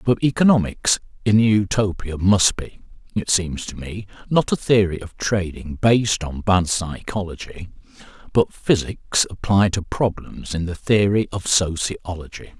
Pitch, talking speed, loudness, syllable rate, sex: 95 Hz, 140 wpm, -20 LUFS, 4.3 syllables/s, male